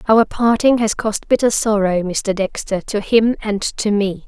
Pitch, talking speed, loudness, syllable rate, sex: 210 Hz, 180 wpm, -17 LUFS, 4.3 syllables/s, female